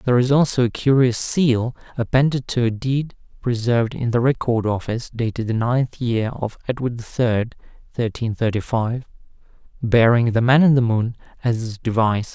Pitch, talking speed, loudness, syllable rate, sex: 120 Hz, 170 wpm, -20 LUFS, 4.9 syllables/s, male